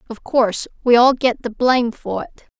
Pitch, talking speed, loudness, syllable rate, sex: 240 Hz, 210 wpm, -17 LUFS, 5.1 syllables/s, female